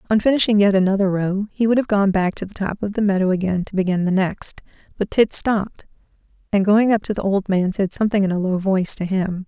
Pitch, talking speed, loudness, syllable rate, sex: 195 Hz, 245 wpm, -19 LUFS, 6.1 syllables/s, female